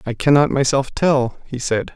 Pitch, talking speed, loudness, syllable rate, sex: 130 Hz, 185 wpm, -18 LUFS, 4.5 syllables/s, male